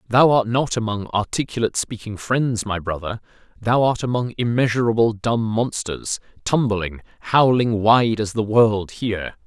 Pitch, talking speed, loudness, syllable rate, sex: 115 Hz, 140 wpm, -20 LUFS, 4.6 syllables/s, male